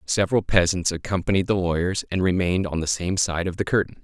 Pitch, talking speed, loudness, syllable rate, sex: 90 Hz, 210 wpm, -23 LUFS, 6.3 syllables/s, male